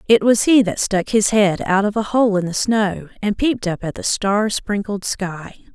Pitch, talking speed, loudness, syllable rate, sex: 205 Hz, 230 wpm, -18 LUFS, 4.6 syllables/s, female